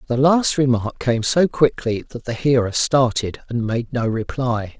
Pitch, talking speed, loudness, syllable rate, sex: 125 Hz, 175 wpm, -19 LUFS, 4.3 syllables/s, male